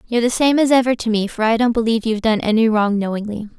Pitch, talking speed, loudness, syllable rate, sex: 225 Hz, 270 wpm, -17 LUFS, 7.2 syllables/s, female